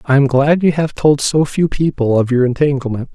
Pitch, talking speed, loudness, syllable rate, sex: 140 Hz, 230 wpm, -14 LUFS, 5.3 syllables/s, male